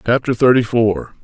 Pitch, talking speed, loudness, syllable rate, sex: 115 Hz, 145 wpm, -15 LUFS, 4.7 syllables/s, male